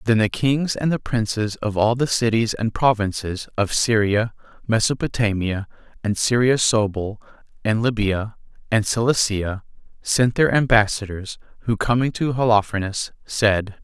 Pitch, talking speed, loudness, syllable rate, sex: 110 Hz, 130 wpm, -21 LUFS, 4.5 syllables/s, male